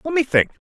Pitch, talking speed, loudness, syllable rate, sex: 230 Hz, 265 wpm, -19 LUFS, 7.3 syllables/s, male